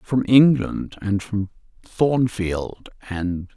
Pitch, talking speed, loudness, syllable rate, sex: 110 Hz, 100 wpm, -21 LUFS, 2.8 syllables/s, male